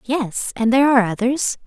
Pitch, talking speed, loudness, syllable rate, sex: 245 Hz, 180 wpm, -18 LUFS, 5.4 syllables/s, female